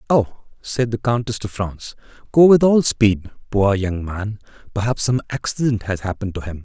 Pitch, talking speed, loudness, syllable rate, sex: 110 Hz, 170 wpm, -19 LUFS, 4.9 syllables/s, male